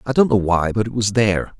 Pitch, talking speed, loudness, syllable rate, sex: 110 Hz, 300 wpm, -18 LUFS, 6.3 syllables/s, male